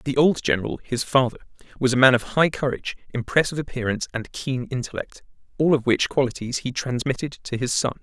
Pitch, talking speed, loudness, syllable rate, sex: 130 Hz, 185 wpm, -23 LUFS, 6.1 syllables/s, male